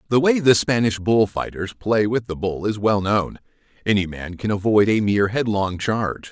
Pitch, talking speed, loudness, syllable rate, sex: 105 Hz, 200 wpm, -20 LUFS, 5.0 syllables/s, male